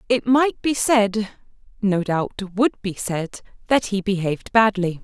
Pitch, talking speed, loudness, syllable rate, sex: 205 Hz, 155 wpm, -21 LUFS, 4.1 syllables/s, female